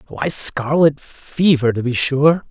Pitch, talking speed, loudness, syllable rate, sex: 145 Hz, 145 wpm, -16 LUFS, 3.5 syllables/s, male